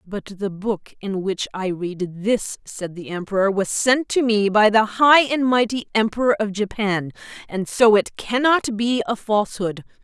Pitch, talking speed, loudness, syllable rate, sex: 210 Hz, 180 wpm, -20 LUFS, 4.3 syllables/s, female